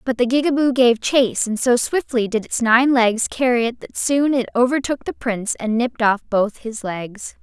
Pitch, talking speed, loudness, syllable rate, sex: 240 Hz, 210 wpm, -19 LUFS, 4.9 syllables/s, female